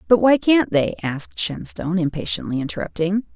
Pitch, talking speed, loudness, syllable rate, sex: 185 Hz, 145 wpm, -20 LUFS, 5.6 syllables/s, female